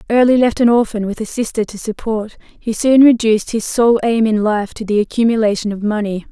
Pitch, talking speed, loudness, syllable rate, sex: 220 Hz, 210 wpm, -15 LUFS, 5.6 syllables/s, female